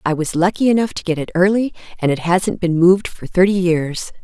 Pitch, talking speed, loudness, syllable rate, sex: 180 Hz, 225 wpm, -17 LUFS, 5.6 syllables/s, female